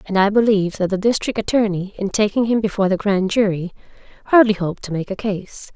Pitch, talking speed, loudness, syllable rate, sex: 200 Hz, 210 wpm, -18 LUFS, 6.2 syllables/s, female